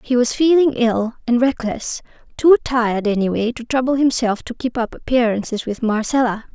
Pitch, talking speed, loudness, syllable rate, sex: 240 Hz, 165 wpm, -18 LUFS, 5.1 syllables/s, female